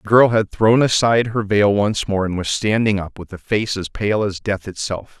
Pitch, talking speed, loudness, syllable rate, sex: 105 Hz, 240 wpm, -18 LUFS, 4.9 syllables/s, male